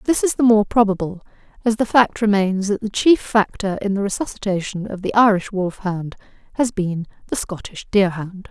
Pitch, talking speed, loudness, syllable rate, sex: 205 Hz, 175 wpm, -19 LUFS, 5.1 syllables/s, female